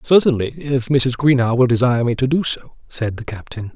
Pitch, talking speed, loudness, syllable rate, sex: 125 Hz, 210 wpm, -18 LUFS, 5.4 syllables/s, male